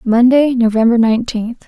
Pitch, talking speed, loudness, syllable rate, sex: 235 Hz, 105 wpm, -13 LUFS, 5.3 syllables/s, female